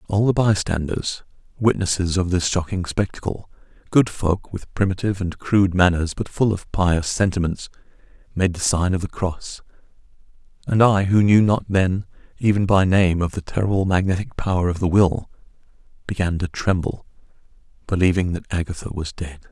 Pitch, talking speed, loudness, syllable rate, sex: 95 Hz, 155 wpm, -21 LUFS, 5.2 syllables/s, male